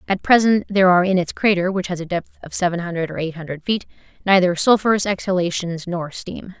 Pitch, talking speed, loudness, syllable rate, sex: 180 Hz, 210 wpm, -19 LUFS, 6.0 syllables/s, female